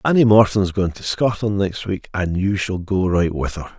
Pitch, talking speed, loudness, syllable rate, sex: 100 Hz, 240 wpm, -19 LUFS, 5.1 syllables/s, male